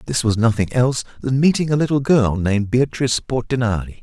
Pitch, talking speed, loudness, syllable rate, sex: 125 Hz, 180 wpm, -18 LUFS, 6.0 syllables/s, male